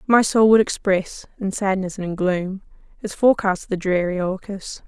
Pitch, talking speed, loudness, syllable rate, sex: 195 Hz, 185 wpm, -20 LUFS, 5.0 syllables/s, female